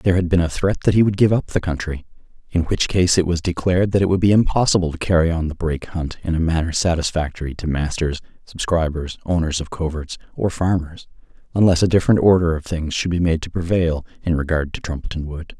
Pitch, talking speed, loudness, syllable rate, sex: 85 Hz, 220 wpm, -20 LUFS, 6.1 syllables/s, male